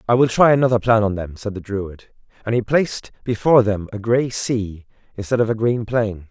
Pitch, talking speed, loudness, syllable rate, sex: 110 Hz, 220 wpm, -19 LUFS, 5.4 syllables/s, male